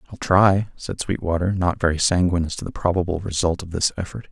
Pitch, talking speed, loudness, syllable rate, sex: 90 Hz, 210 wpm, -21 LUFS, 6.1 syllables/s, male